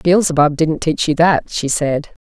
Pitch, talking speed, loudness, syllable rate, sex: 155 Hz, 190 wpm, -15 LUFS, 4.3 syllables/s, female